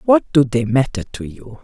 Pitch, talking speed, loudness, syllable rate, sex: 135 Hz, 220 wpm, -17 LUFS, 4.6 syllables/s, female